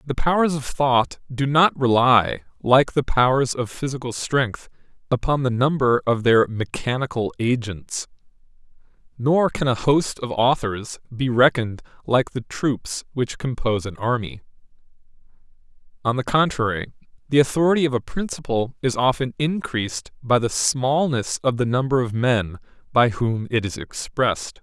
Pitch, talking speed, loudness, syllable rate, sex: 125 Hz, 145 wpm, -21 LUFS, 4.5 syllables/s, male